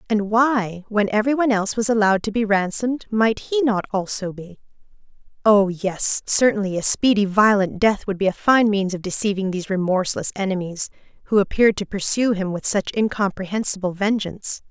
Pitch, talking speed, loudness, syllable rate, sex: 205 Hz, 170 wpm, -20 LUFS, 5.7 syllables/s, female